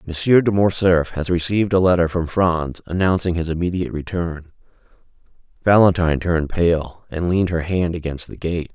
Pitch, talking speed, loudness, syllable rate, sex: 85 Hz, 160 wpm, -19 LUFS, 5.4 syllables/s, male